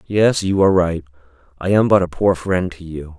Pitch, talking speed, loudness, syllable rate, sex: 90 Hz, 225 wpm, -17 LUFS, 5.1 syllables/s, male